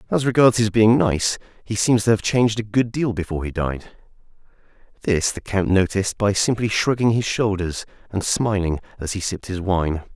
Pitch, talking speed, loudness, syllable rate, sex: 105 Hz, 190 wpm, -20 LUFS, 5.3 syllables/s, male